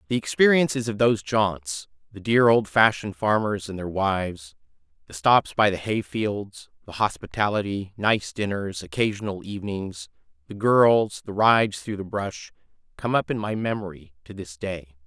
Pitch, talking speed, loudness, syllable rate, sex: 100 Hz, 160 wpm, -23 LUFS, 4.7 syllables/s, male